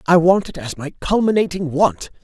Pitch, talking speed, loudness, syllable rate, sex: 170 Hz, 190 wpm, -18 LUFS, 5.0 syllables/s, male